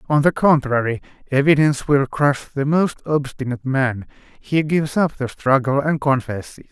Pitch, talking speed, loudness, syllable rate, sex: 140 Hz, 150 wpm, -19 LUFS, 5.0 syllables/s, male